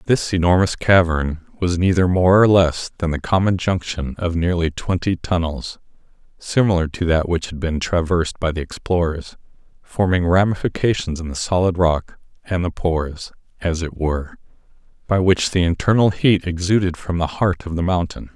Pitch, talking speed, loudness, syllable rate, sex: 85 Hz, 165 wpm, -19 LUFS, 4.3 syllables/s, male